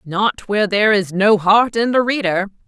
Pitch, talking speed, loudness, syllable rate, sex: 205 Hz, 200 wpm, -16 LUFS, 5.0 syllables/s, female